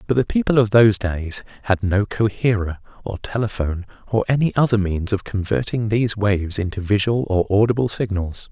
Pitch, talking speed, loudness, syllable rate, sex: 105 Hz, 170 wpm, -20 LUFS, 5.5 syllables/s, male